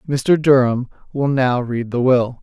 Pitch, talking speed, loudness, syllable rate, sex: 130 Hz, 175 wpm, -17 LUFS, 4.0 syllables/s, male